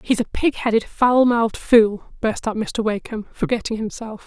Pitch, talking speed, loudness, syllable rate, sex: 225 Hz, 185 wpm, -20 LUFS, 5.0 syllables/s, female